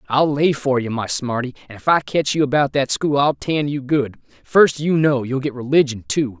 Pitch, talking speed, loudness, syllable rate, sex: 135 Hz, 235 wpm, -19 LUFS, 5.0 syllables/s, male